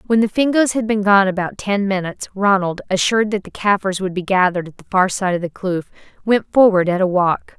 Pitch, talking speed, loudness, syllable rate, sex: 195 Hz, 230 wpm, -17 LUFS, 5.8 syllables/s, female